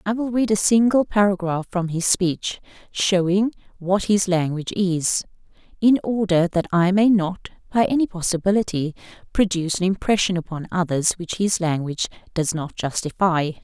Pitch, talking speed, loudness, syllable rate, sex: 185 Hz, 150 wpm, -21 LUFS, 4.9 syllables/s, female